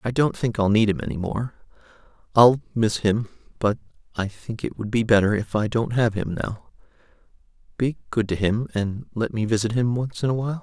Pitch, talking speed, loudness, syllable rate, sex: 110 Hz, 210 wpm, -23 LUFS, 5.4 syllables/s, male